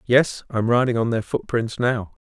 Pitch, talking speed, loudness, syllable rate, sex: 115 Hz, 185 wpm, -22 LUFS, 4.5 syllables/s, male